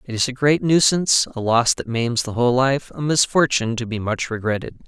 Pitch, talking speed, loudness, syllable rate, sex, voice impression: 125 Hz, 210 wpm, -19 LUFS, 5.6 syllables/s, male, masculine, adult-like, slightly middle-aged, thick, slightly tensed, slightly powerful, slightly dark, slightly hard, clear, slightly fluent, cool, intellectual, slightly refreshing, sincere, very calm, slightly mature, slightly friendly, slightly reassuring, slightly unique, slightly wild, slightly sweet, slightly lively, kind